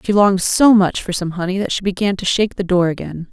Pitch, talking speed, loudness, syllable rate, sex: 190 Hz, 270 wpm, -16 LUFS, 6.3 syllables/s, female